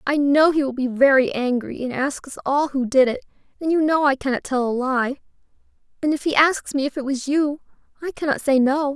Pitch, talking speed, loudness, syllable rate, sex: 275 Hz, 235 wpm, -20 LUFS, 5.5 syllables/s, female